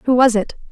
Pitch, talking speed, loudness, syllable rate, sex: 235 Hz, 250 wpm, -16 LUFS, 6.8 syllables/s, female